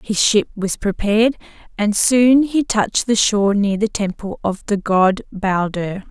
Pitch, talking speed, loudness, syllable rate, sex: 210 Hz, 165 wpm, -17 LUFS, 4.3 syllables/s, female